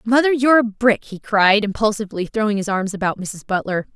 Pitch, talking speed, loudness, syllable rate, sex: 210 Hz, 195 wpm, -18 LUFS, 5.9 syllables/s, female